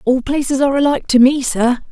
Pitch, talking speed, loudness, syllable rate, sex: 265 Hz, 220 wpm, -14 LUFS, 6.3 syllables/s, female